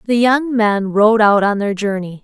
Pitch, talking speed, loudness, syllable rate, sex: 215 Hz, 215 wpm, -14 LUFS, 4.4 syllables/s, female